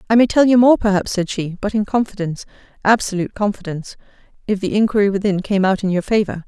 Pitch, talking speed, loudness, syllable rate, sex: 200 Hz, 205 wpm, -17 LUFS, 5.2 syllables/s, female